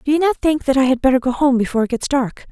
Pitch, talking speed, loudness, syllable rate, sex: 265 Hz, 335 wpm, -17 LUFS, 7.1 syllables/s, female